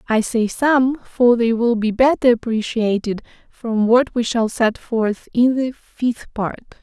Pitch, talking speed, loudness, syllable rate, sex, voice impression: 235 Hz, 165 wpm, -18 LUFS, 4.0 syllables/s, female, feminine, slightly adult-like, slightly refreshing, sincere, friendly, kind